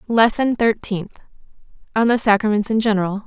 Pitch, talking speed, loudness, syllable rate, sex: 215 Hz, 130 wpm, -18 LUFS, 5.5 syllables/s, female